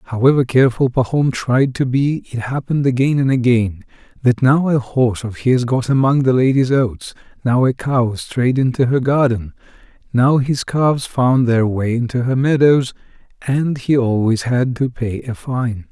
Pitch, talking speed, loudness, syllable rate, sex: 125 Hz, 175 wpm, -16 LUFS, 4.6 syllables/s, male